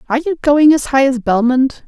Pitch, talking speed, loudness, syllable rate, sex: 270 Hz, 225 wpm, -13 LUFS, 5.4 syllables/s, female